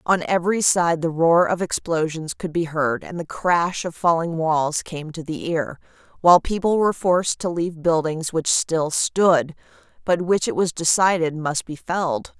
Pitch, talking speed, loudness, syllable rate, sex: 165 Hz, 185 wpm, -21 LUFS, 4.6 syllables/s, female